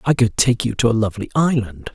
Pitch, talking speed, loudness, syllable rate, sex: 115 Hz, 245 wpm, -18 LUFS, 6.2 syllables/s, male